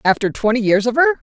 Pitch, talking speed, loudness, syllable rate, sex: 240 Hz, 230 wpm, -16 LUFS, 6.2 syllables/s, female